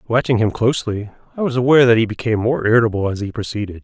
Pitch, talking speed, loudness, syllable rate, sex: 115 Hz, 220 wpm, -17 LUFS, 7.6 syllables/s, male